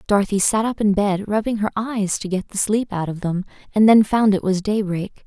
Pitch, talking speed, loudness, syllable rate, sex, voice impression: 205 Hz, 240 wpm, -20 LUFS, 5.3 syllables/s, female, very feminine, slightly young, soft, cute, calm, friendly, slightly sweet, kind